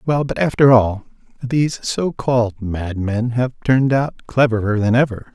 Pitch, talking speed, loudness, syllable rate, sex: 120 Hz, 145 wpm, -18 LUFS, 4.7 syllables/s, male